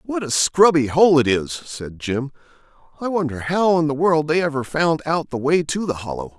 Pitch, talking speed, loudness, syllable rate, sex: 150 Hz, 215 wpm, -19 LUFS, 4.9 syllables/s, male